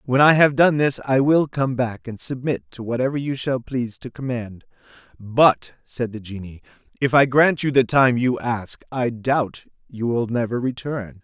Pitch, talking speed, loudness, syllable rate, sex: 125 Hz, 190 wpm, -20 LUFS, 4.5 syllables/s, male